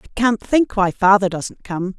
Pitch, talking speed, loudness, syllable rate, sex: 205 Hz, 210 wpm, -18 LUFS, 4.4 syllables/s, female